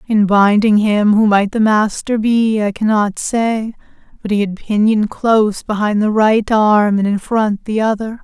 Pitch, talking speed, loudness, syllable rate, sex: 215 Hz, 180 wpm, -14 LUFS, 4.4 syllables/s, female